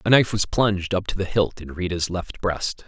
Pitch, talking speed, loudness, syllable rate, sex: 95 Hz, 250 wpm, -23 LUFS, 5.4 syllables/s, male